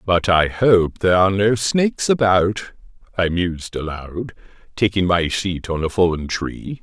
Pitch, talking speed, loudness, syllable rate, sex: 95 Hz, 160 wpm, -18 LUFS, 4.5 syllables/s, male